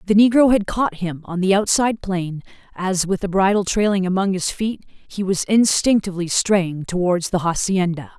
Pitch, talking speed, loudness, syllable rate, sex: 190 Hz, 175 wpm, -19 LUFS, 4.9 syllables/s, female